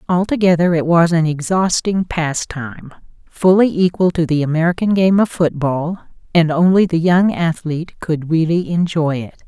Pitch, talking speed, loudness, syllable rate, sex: 170 Hz, 140 wpm, -16 LUFS, 4.8 syllables/s, female